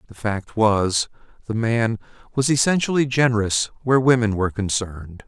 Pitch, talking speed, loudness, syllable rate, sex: 115 Hz, 135 wpm, -20 LUFS, 5.3 syllables/s, male